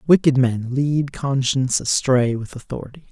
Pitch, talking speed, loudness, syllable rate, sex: 135 Hz, 135 wpm, -20 LUFS, 4.8 syllables/s, male